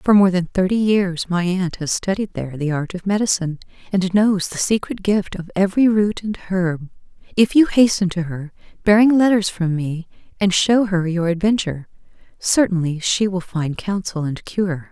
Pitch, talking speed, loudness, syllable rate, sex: 185 Hz, 180 wpm, -19 LUFS, 5.0 syllables/s, female